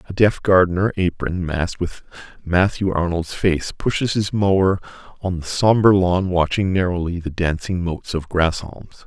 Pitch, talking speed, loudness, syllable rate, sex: 90 Hz, 150 wpm, -19 LUFS, 4.9 syllables/s, male